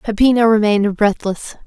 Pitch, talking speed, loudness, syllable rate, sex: 215 Hz, 110 wpm, -15 LUFS, 5.3 syllables/s, female